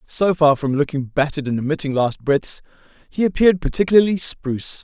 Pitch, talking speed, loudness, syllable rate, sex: 155 Hz, 160 wpm, -19 LUFS, 5.9 syllables/s, male